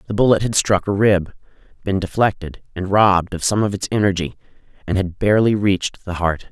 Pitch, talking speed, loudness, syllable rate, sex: 100 Hz, 195 wpm, -18 LUFS, 5.9 syllables/s, male